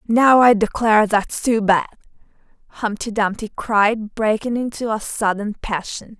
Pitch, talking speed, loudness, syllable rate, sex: 215 Hz, 135 wpm, -18 LUFS, 4.4 syllables/s, female